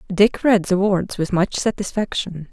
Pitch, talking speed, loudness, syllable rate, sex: 195 Hz, 165 wpm, -19 LUFS, 4.3 syllables/s, female